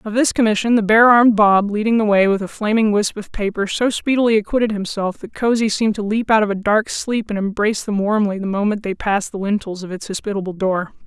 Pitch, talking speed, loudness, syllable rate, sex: 210 Hz, 240 wpm, -18 LUFS, 6.1 syllables/s, female